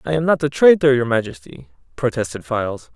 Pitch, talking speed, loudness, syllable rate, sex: 125 Hz, 185 wpm, -18 LUFS, 5.8 syllables/s, male